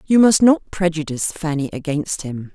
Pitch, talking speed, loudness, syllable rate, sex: 165 Hz, 165 wpm, -18 LUFS, 5.0 syllables/s, female